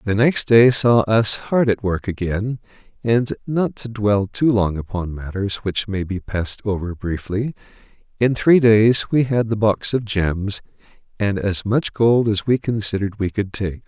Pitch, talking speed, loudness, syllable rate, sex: 105 Hz, 180 wpm, -19 LUFS, 4.3 syllables/s, male